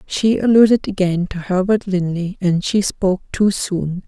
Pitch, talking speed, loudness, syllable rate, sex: 190 Hz, 160 wpm, -17 LUFS, 4.5 syllables/s, female